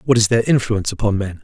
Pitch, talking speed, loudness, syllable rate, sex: 110 Hz, 250 wpm, -17 LUFS, 6.9 syllables/s, male